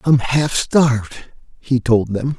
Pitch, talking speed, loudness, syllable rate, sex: 125 Hz, 150 wpm, -17 LUFS, 3.8 syllables/s, male